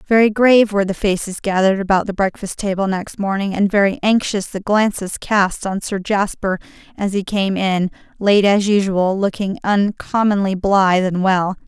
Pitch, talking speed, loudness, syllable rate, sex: 195 Hz, 170 wpm, -17 LUFS, 5.0 syllables/s, female